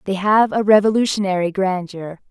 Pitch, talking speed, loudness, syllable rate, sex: 195 Hz, 130 wpm, -17 LUFS, 5.2 syllables/s, female